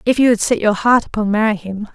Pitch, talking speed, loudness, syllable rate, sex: 215 Hz, 280 wpm, -16 LUFS, 6.0 syllables/s, female